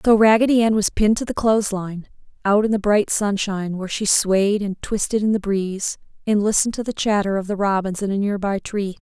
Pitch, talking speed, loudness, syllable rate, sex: 205 Hz, 225 wpm, -20 LUFS, 5.8 syllables/s, female